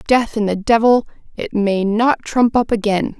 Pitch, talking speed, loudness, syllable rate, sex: 220 Hz, 170 wpm, -16 LUFS, 4.5 syllables/s, female